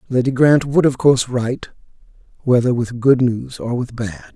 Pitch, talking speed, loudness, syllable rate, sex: 125 Hz, 180 wpm, -17 LUFS, 5.2 syllables/s, male